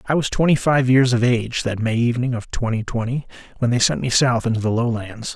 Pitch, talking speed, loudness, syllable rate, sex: 120 Hz, 235 wpm, -19 LUFS, 6.0 syllables/s, male